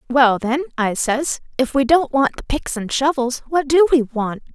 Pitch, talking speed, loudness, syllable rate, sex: 265 Hz, 210 wpm, -18 LUFS, 4.5 syllables/s, female